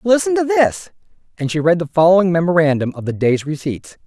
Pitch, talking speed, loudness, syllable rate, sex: 175 Hz, 190 wpm, -16 LUFS, 5.8 syllables/s, male